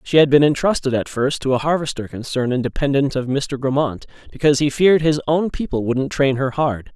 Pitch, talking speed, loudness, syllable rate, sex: 140 Hz, 205 wpm, -19 LUFS, 5.7 syllables/s, male